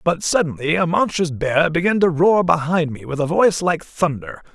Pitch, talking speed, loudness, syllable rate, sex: 165 Hz, 200 wpm, -18 LUFS, 5.1 syllables/s, male